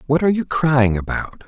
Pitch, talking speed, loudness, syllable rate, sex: 140 Hz, 205 wpm, -18 LUFS, 5.3 syllables/s, male